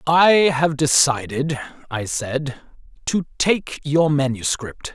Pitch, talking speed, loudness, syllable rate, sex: 145 Hz, 110 wpm, -19 LUFS, 3.3 syllables/s, male